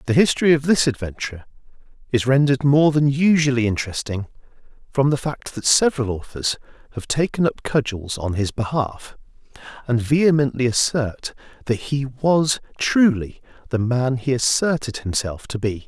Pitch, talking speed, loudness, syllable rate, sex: 130 Hz, 145 wpm, -20 LUFS, 5.1 syllables/s, male